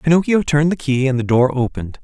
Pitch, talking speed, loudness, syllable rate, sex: 140 Hz, 235 wpm, -17 LUFS, 6.5 syllables/s, male